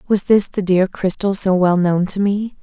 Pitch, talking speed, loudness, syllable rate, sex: 190 Hz, 230 wpm, -17 LUFS, 4.6 syllables/s, female